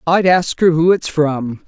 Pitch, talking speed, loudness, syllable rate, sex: 160 Hz, 215 wpm, -15 LUFS, 3.9 syllables/s, female